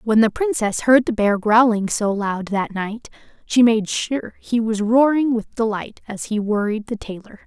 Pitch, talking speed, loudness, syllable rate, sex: 220 Hz, 195 wpm, -19 LUFS, 4.4 syllables/s, female